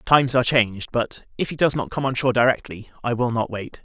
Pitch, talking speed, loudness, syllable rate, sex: 125 Hz, 250 wpm, -22 LUFS, 6.4 syllables/s, male